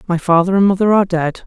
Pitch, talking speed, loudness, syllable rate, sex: 185 Hz, 245 wpm, -14 LUFS, 6.9 syllables/s, female